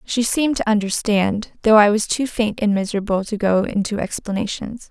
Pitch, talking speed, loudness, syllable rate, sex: 210 Hz, 185 wpm, -19 LUFS, 5.4 syllables/s, female